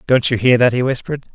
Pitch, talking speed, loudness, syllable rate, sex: 125 Hz, 265 wpm, -15 LUFS, 7.1 syllables/s, male